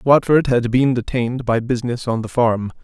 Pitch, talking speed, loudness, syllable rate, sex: 120 Hz, 190 wpm, -18 LUFS, 5.3 syllables/s, male